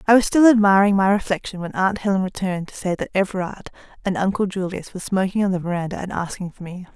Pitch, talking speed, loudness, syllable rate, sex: 190 Hz, 225 wpm, -21 LUFS, 6.8 syllables/s, female